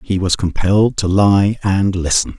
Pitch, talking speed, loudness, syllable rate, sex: 95 Hz, 175 wpm, -15 LUFS, 4.5 syllables/s, male